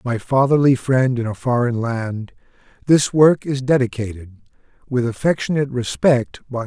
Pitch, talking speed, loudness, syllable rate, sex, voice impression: 125 Hz, 135 wpm, -18 LUFS, 4.7 syllables/s, male, masculine, slightly middle-aged, slightly thick, cool, slightly refreshing, sincere, slightly calm, slightly elegant